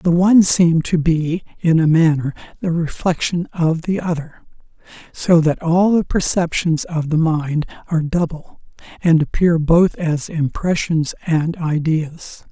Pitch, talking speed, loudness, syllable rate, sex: 165 Hz, 145 wpm, -17 LUFS, 4.1 syllables/s, male